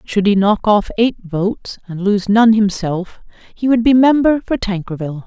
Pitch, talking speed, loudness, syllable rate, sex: 210 Hz, 180 wpm, -15 LUFS, 4.6 syllables/s, female